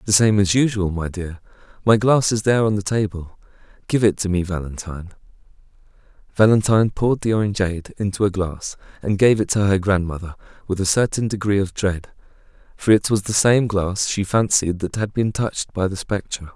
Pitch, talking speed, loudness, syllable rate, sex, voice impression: 100 Hz, 185 wpm, -20 LUFS, 5.6 syllables/s, male, masculine, adult-like, slightly thick, slightly dark, cool, sincere, slightly calm, slightly kind